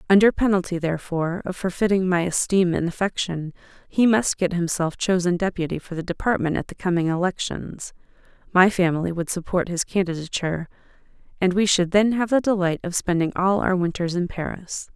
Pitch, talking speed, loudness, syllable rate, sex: 180 Hz, 170 wpm, -22 LUFS, 5.6 syllables/s, female